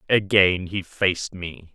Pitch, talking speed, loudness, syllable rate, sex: 90 Hz, 135 wpm, -21 LUFS, 3.8 syllables/s, male